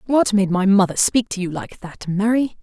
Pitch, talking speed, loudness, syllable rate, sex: 205 Hz, 230 wpm, -18 LUFS, 4.9 syllables/s, female